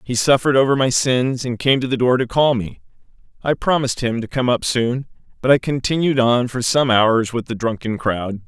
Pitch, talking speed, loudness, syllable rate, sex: 125 Hz, 220 wpm, -18 LUFS, 5.3 syllables/s, male